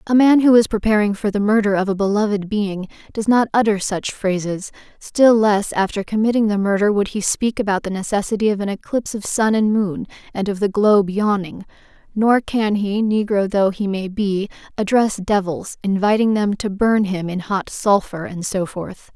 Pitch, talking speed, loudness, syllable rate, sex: 205 Hz, 195 wpm, -18 LUFS, 5.0 syllables/s, female